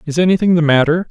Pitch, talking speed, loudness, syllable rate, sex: 165 Hz, 215 wpm, -13 LUFS, 7.1 syllables/s, male